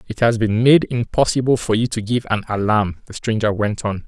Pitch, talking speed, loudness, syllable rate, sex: 110 Hz, 220 wpm, -18 LUFS, 5.3 syllables/s, male